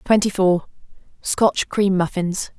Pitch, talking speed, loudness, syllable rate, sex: 190 Hz, 95 wpm, -20 LUFS, 3.7 syllables/s, female